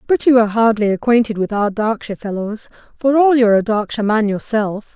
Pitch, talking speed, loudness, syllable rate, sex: 220 Hz, 195 wpm, -16 LUFS, 6.0 syllables/s, female